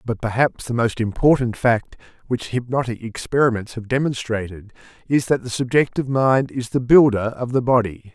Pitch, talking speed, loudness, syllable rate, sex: 120 Hz, 160 wpm, -20 LUFS, 5.2 syllables/s, male